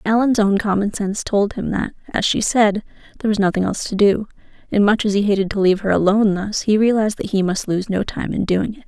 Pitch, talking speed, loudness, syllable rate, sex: 205 Hz, 250 wpm, -18 LUFS, 6.3 syllables/s, female